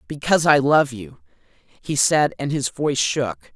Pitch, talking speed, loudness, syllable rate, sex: 145 Hz, 170 wpm, -19 LUFS, 4.2 syllables/s, female